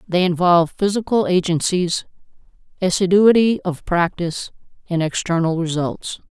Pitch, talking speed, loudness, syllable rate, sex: 180 Hz, 95 wpm, -18 LUFS, 4.8 syllables/s, female